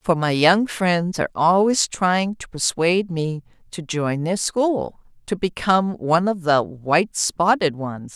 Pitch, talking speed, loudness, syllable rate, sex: 175 Hz, 160 wpm, -20 LUFS, 4.1 syllables/s, female